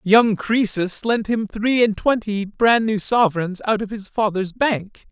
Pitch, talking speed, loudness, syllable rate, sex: 215 Hz, 175 wpm, -20 LUFS, 4.1 syllables/s, male